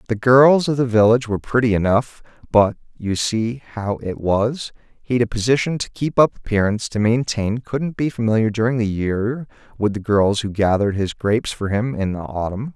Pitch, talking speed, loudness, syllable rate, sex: 115 Hz, 180 wpm, -19 LUFS, 5.2 syllables/s, male